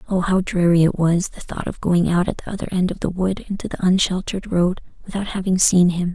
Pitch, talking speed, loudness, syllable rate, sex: 180 Hz, 235 wpm, -20 LUFS, 5.9 syllables/s, female